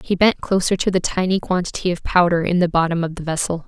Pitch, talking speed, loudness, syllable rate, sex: 175 Hz, 245 wpm, -19 LUFS, 6.2 syllables/s, female